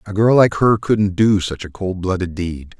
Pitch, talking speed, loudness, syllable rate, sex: 100 Hz, 235 wpm, -17 LUFS, 4.6 syllables/s, male